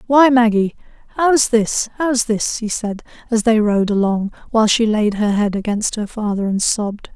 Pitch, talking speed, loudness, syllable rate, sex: 220 Hz, 185 wpm, -17 LUFS, 4.6 syllables/s, female